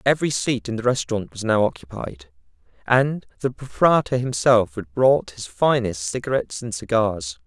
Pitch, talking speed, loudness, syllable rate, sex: 115 Hz, 155 wpm, -21 LUFS, 5.0 syllables/s, male